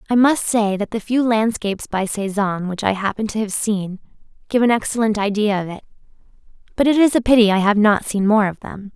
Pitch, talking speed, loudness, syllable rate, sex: 215 Hz, 220 wpm, -18 LUFS, 5.7 syllables/s, female